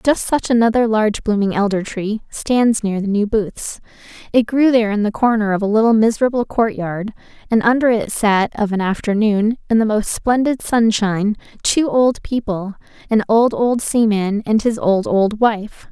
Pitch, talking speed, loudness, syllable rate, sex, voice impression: 220 Hz, 180 wpm, -17 LUFS, 4.8 syllables/s, female, feminine, young, bright, slightly soft, slightly cute, friendly, slightly sweet, slightly modest